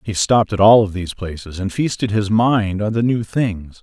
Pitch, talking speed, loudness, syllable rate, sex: 105 Hz, 235 wpm, -17 LUFS, 5.1 syllables/s, male